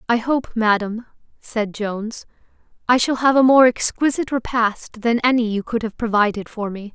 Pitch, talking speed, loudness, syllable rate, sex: 230 Hz, 175 wpm, -19 LUFS, 5.0 syllables/s, female